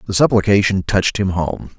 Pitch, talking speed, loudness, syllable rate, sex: 100 Hz, 170 wpm, -16 LUFS, 5.7 syllables/s, male